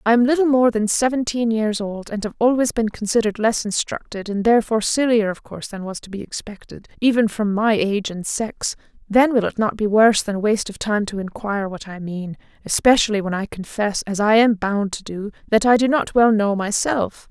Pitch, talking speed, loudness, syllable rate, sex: 215 Hz, 215 wpm, -20 LUFS, 5.6 syllables/s, female